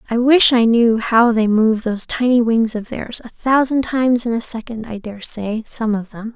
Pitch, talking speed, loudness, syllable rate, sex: 230 Hz, 215 wpm, -17 LUFS, 4.8 syllables/s, female